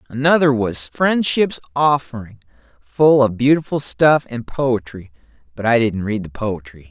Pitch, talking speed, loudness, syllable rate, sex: 120 Hz, 140 wpm, -17 LUFS, 4.4 syllables/s, male